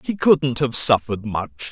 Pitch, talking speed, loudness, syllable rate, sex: 125 Hz, 175 wpm, -19 LUFS, 5.0 syllables/s, male